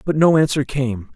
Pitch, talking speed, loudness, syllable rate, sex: 135 Hz, 205 wpm, -18 LUFS, 4.9 syllables/s, male